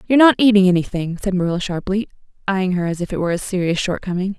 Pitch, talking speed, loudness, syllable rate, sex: 190 Hz, 220 wpm, -18 LUFS, 7.5 syllables/s, female